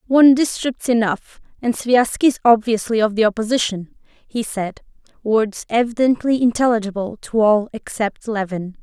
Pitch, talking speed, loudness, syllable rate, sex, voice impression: 225 Hz, 120 wpm, -18 LUFS, 4.7 syllables/s, female, gender-neutral, young, tensed, powerful, bright, clear, fluent, intellectual, slightly friendly, unique, lively, intense, sharp